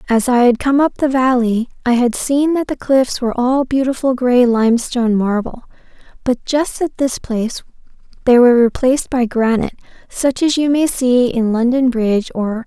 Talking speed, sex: 190 wpm, female